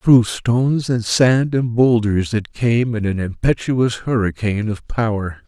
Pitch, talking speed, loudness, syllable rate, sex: 115 Hz, 155 wpm, -18 LUFS, 4.1 syllables/s, male